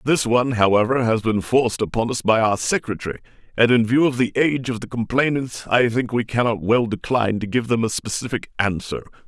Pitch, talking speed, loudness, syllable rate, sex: 120 Hz, 205 wpm, -20 LUFS, 5.9 syllables/s, male